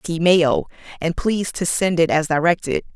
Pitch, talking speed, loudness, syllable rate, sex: 170 Hz, 185 wpm, -19 LUFS, 5.0 syllables/s, female